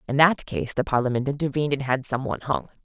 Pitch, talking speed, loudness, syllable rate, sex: 135 Hz, 230 wpm, -24 LUFS, 6.7 syllables/s, female